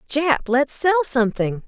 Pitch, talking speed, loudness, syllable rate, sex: 250 Hz, 145 wpm, -19 LUFS, 4.8 syllables/s, female